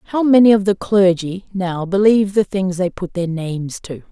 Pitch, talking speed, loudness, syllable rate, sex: 190 Hz, 205 wpm, -16 LUFS, 5.1 syllables/s, female